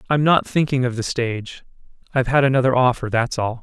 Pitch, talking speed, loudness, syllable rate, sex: 125 Hz, 200 wpm, -19 LUFS, 6.1 syllables/s, male